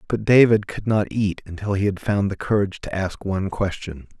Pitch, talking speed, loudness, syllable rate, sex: 100 Hz, 215 wpm, -21 LUFS, 5.4 syllables/s, male